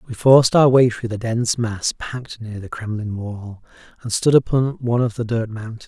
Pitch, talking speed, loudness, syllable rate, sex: 115 Hz, 215 wpm, -19 LUFS, 5.3 syllables/s, male